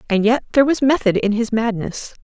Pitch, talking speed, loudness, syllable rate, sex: 230 Hz, 215 wpm, -18 LUFS, 5.9 syllables/s, female